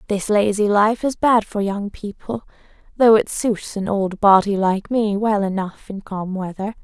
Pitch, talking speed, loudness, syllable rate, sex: 205 Hz, 185 wpm, -19 LUFS, 4.3 syllables/s, female